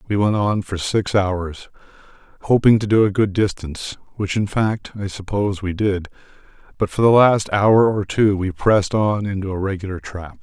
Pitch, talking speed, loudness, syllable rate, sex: 100 Hz, 190 wpm, -19 LUFS, 5.0 syllables/s, male